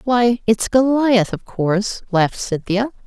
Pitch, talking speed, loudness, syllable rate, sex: 220 Hz, 135 wpm, -18 LUFS, 4.1 syllables/s, female